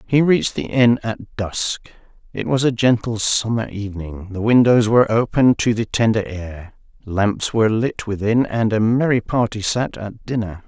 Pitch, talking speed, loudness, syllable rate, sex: 110 Hz, 175 wpm, -18 LUFS, 4.7 syllables/s, male